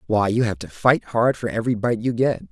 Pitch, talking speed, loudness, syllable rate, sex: 115 Hz, 260 wpm, -21 LUFS, 5.5 syllables/s, male